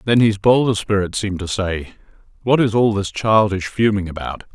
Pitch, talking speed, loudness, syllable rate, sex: 105 Hz, 185 wpm, -18 LUFS, 5.3 syllables/s, male